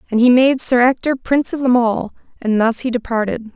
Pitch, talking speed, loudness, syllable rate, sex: 240 Hz, 220 wpm, -16 LUFS, 5.6 syllables/s, female